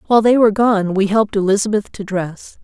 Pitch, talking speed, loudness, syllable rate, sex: 205 Hz, 205 wpm, -16 LUFS, 6.2 syllables/s, female